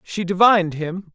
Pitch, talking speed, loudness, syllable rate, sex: 185 Hz, 155 wpm, -18 LUFS, 4.8 syllables/s, male